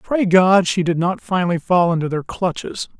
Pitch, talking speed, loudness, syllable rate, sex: 180 Hz, 200 wpm, -18 LUFS, 5.0 syllables/s, male